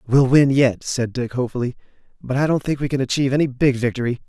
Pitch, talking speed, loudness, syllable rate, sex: 130 Hz, 225 wpm, -19 LUFS, 6.7 syllables/s, male